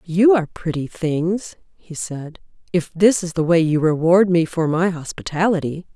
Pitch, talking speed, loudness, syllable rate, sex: 170 Hz, 170 wpm, -19 LUFS, 4.6 syllables/s, female